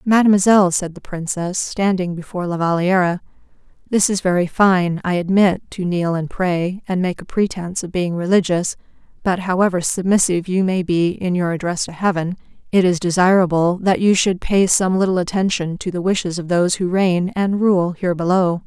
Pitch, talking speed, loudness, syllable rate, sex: 180 Hz, 185 wpm, -18 LUFS, 5.3 syllables/s, female